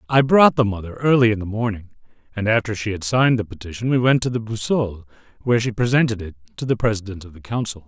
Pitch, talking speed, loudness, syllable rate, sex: 110 Hz, 230 wpm, -20 LUFS, 6.8 syllables/s, male